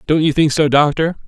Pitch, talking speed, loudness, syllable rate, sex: 150 Hz, 235 wpm, -15 LUFS, 5.7 syllables/s, male